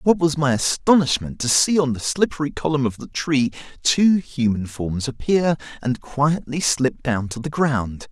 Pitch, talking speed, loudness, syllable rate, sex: 140 Hz, 175 wpm, -20 LUFS, 4.4 syllables/s, male